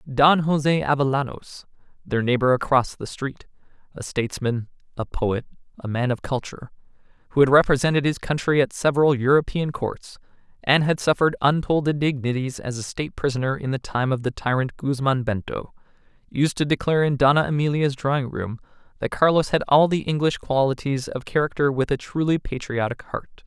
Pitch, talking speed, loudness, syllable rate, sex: 140 Hz, 165 wpm, -22 LUFS, 4.3 syllables/s, male